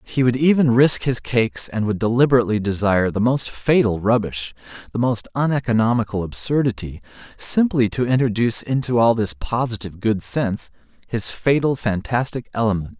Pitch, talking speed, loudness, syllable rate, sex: 115 Hz, 145 wpm, -20 LUFS, 5.5 syllables/s, male